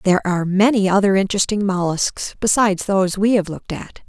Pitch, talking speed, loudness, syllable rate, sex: 195 Hz, 175 wpm, -18 LUFS, 6.2 syllables/s, female